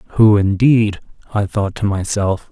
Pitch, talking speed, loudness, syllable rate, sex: 100 Hz, 145 wpm, -16 LUFS, 3.8 syllables/s, male